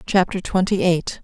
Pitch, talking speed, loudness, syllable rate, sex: 180 Hz, 145 wpm, -20 LUFS, 4.5 syllables/s, female